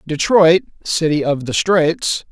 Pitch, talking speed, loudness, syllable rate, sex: 165 Hz, 130 wpm, -15 LUFS, 3.6 syllables/s, male